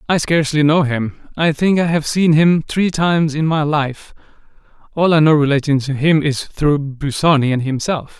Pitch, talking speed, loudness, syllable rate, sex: 150 Hz, 190 wpm, -16 LUFS, 4.9 syllables/s, male